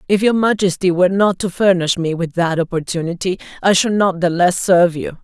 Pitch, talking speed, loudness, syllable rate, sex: 180 Hz, 205 wpm, -16 LUFS, 5.6 syllables/s, male